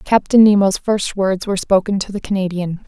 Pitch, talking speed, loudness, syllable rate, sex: 195 Hz, 190 wpm, -16 LUFS, 5.4 syllables/s, female